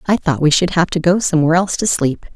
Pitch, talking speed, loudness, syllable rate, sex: 170 Hz, 280 wpm, -15 LUFS, 7.0 syllables/s, female